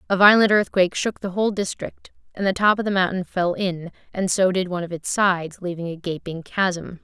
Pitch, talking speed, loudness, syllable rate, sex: 185 Hz, 220 wpm, -21 LUFS, 5.6 syllables/s, female